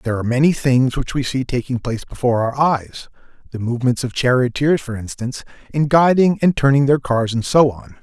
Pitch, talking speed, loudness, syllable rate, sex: 130 Hz, 195 wpm, -18 LUFS, 5.9 syllables/s, male